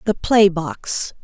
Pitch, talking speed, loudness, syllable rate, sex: 185 Hz, 145 wpm, -18 LUFS, 2.9 syllables/s, female